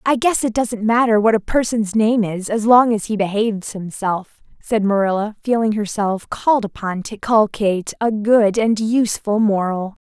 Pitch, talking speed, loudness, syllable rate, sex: 215 Hz, 175 wpm, -18 LUFS, 4.8 syllables/s, female